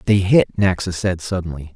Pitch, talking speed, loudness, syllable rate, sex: 90 Hz, 170 wpm, -18 LUFS, 5.0 syllables/s, male